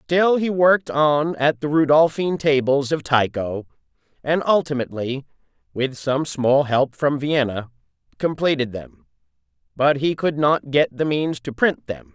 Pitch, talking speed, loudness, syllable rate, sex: 145 Hz, 150 wpm, -20 LUFS, 4.4 syllables/s, male